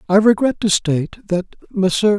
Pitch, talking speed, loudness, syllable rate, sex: 200 Hz, 165 wpm, -17 LUFS, 4.2 syllables/s, male